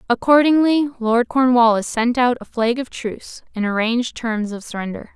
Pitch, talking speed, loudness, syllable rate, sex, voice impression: 240 Hz, 165 wpm, -18 LUFS, 5.1 syllables/s, female, very feminine, very young, very thin, tensed, slightly powerful, very bright, slightly soft, very clear, slightly fluent, very cute, slightly cool, intellectual, very refreshing, sincere, slightly calm, friendly, reassuring, slightly unique, elegant, slightly sweet, very lively, kind, slightly intense